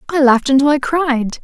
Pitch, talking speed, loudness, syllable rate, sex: 275 Hz, 210 wpm, -14 LUFS, 6.3 syllables/s, female